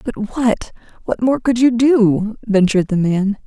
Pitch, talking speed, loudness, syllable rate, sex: 220 Hz, 155 wpm, -16 LUFS, 4.3 syllables/s, female